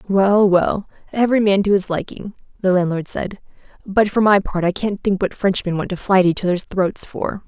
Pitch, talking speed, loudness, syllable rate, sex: 195 Hz, 215 wpm, -18 LUFS, 5.2 syllables/s, female